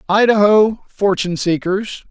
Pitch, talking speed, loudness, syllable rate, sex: 195 Hz, 85 wpm, -15 LUFS, 4.4 syllables/s, male